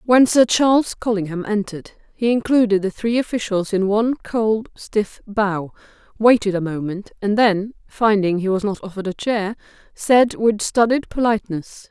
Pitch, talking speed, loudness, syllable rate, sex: 215 Hz, 155 wpm, -19 LUFS, 4.8 syllables/s, female